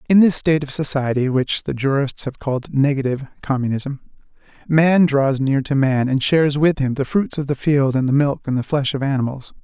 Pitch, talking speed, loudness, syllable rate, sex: 140 Hz, 195 wpm, -19 LUFS, 5.4 syllables/s, male